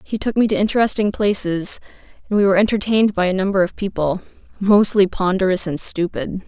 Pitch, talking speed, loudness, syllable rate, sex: 195 Hz, 175 wpm, -18 LUFS, 6.0 syllables/s, female